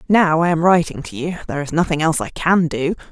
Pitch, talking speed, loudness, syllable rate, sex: 165 Hz, 250 wpm, -18 LUFS, 3.6 syllables/s, female